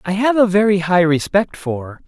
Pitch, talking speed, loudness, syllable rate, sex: 185 Hz, 205 wpm, -16 LUFS, 4.7 syllables/s, male